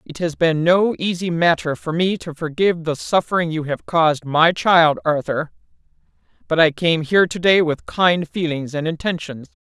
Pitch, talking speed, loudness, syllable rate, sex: 165 Hz, 180 wpm, -18 LUFS, 4.9 syllables/s, female